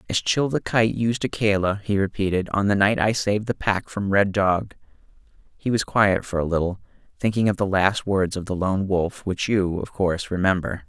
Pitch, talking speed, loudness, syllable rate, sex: 100 Hz, 210 wpm, -22 LUFS, 5.1 syllables/s, male